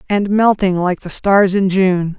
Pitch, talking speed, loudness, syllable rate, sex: 190 Hz, 195 wpm, -14 LUFS, 4.0 syllables/s, female